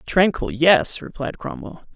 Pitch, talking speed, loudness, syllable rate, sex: 170 Hz, 125 wpm, -20 LUFS, 4.0 syllables/s, male